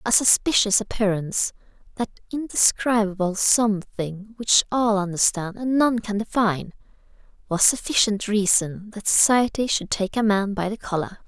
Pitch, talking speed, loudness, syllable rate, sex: 210 Hz, 135 wpm, -21 LUFS, 4.8 syllables/s, female